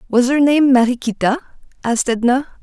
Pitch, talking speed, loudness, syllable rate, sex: 255 Hz, 135 wpm, -16 LUFS, 6.0 syllables/s, female